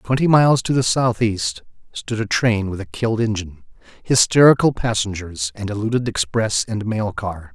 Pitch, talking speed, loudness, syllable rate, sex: 110 Hz, 165 wpm, -19 LUFS, 5.0 syllables/s, male